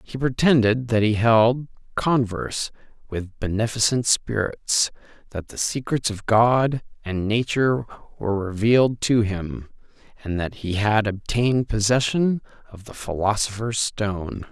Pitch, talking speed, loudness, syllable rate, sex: 110 Hz, 125 wpm, -22 LUFS, 4.4 syllables/s, male